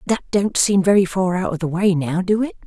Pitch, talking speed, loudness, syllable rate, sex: 190 Hz, 270 wpm, -18 LUFS, 5.5 syllables/s, female